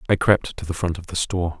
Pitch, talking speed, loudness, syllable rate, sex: 85 Hz, 300 wpm, -22 LUFS, 6.4 syllables/s, male